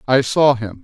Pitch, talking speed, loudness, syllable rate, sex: 125 Hz, 215 wpm, -16 LUFS, 4.5 syllables/s, male